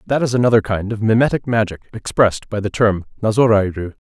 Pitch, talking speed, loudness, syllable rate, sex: 110 Hz, 175 wpm, -17 LUFS, 6.2 syllables/s, male